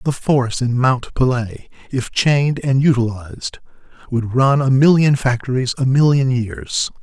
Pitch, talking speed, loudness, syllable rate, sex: 130 Hz, 145 wpm, -17 LUFS, 4.4 syllables/s, male